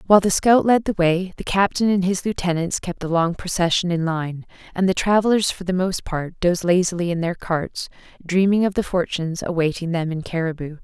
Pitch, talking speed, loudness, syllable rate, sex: 180 Hz, 205 wpm, -20 LUFS, 5.5 syllables/s, female